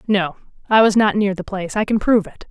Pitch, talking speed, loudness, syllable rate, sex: 200 Hz, 265 wpm, -18 LUFS, 6.5 syllables/s, female